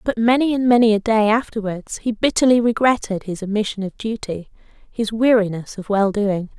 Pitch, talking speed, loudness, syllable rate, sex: 215 Hz, 175 wpm, -19 LUFS, 5.3 syllables/s, female